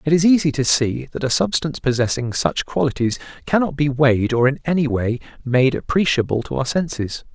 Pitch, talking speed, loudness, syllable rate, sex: 135 Hz, 190 wpm, -19 LUFS, 5.6 syllables/s, male